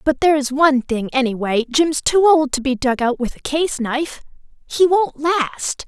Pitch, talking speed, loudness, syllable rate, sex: 285 Hz, 195 wpm, -18 LUFS, 4.6 syllables/s, female